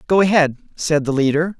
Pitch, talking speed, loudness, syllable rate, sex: 160 Hz, 190 wpm, -17 LUFS, 5.6 syllables/s, male